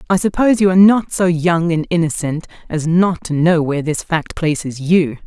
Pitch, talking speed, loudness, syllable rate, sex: 170 Hz, 205 wpm, -16 LUFS, 5.2 syllables/s, female